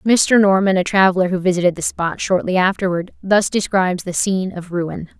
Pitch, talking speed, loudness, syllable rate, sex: 185 Hz, 185 wpm, -17 LUFS, 5.4 syllables/s, female